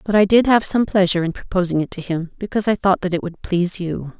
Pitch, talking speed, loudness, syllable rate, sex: 185 Hz, 270 wpm, -19 LUFS, 6.5 syllables/s, female